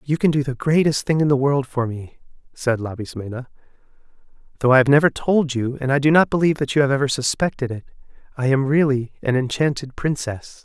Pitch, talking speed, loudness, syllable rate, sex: 135 Hz, 205 wpm, -20 LUFS, 5.9 syllables/s, male